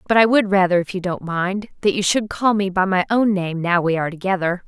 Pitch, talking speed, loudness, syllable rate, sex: 190 Hz, 270 wpm, -19 LUFS, 5.8 syllables/s, female